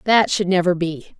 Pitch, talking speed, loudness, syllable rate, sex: 180 Hz, 200 wpm, -19 LUFS, 4.8 syllables/s, female